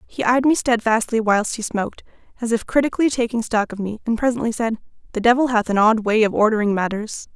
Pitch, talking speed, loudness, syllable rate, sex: 225 Hz, 210 wpm, -19 LUFS, 6.1 syllables/s, female